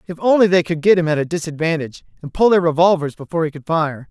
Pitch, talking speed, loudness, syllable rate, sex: 165 Hz, 250 wpm, -17 LUFS, 6.9 syllables/s, male